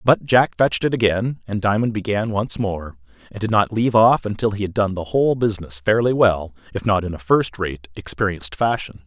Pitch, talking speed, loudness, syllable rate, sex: 105 Hz, 210 wpm, -20 LUFS, 5.6 syllables/s, male